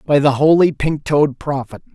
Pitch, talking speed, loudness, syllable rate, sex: 145 Hz, 185 wpm, -16 LUFS, 4.7 syllables/s, male